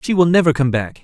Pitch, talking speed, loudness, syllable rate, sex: 150 Hz, 290 wpm, -15 LUFS, 6.5 syllables/s, male